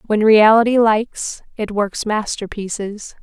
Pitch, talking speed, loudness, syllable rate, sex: 215 Hz, 110 wpm, -17 LUFS, 4.1 syllables/s, female